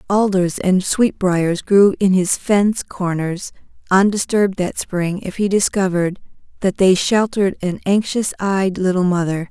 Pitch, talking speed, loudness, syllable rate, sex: 190 Hz, 140 wpm, -17 LUFS, 4.4 syllables/s, female